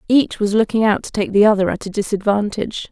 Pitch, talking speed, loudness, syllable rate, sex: 210 Hz, 225 wpm, -17 LUFS, 6.2 syllables/s, female